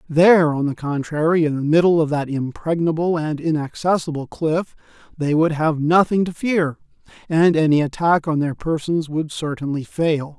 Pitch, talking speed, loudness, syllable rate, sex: 155 Hz, 160 wpm, -19 LUFS, 4.8 syllables/s, male